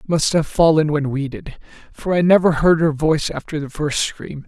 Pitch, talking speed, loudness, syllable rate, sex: 155 Hz, 215 wpm, -18 LUFS, 5.1 syllables/s, male